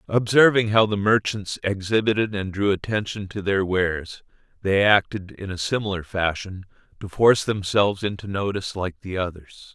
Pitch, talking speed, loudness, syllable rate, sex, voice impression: 100 Hz, 155 wpm, -22 LUFS, 5.1 syllables/s, male, very masculine, very adult-like, thick, cool, wild